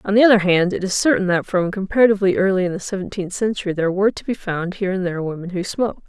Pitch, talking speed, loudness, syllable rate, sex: 190 Hz, 255 wpm, -19 LUFS, 7.4 syllables/s, female